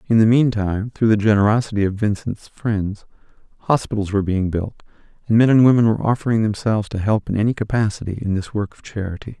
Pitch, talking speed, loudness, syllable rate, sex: 105 Hz, 190 wpm, -19 LUFS, 6.5 syllables/s, male